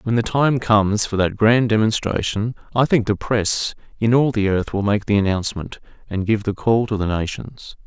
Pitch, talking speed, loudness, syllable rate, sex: 105 Hz, 205 wpm, -19 LUFS, 5.0 syllables/s, male